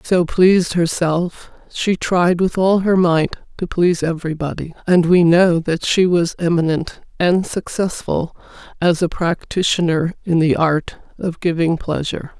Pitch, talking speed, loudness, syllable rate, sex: 170 Hz, 145 wpm, -17 LUFS, 4.3 syllables/s, female